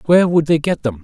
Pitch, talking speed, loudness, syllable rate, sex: 150 Hz, 290 wpm, -15 LUFS, 6.7 syllables/s, male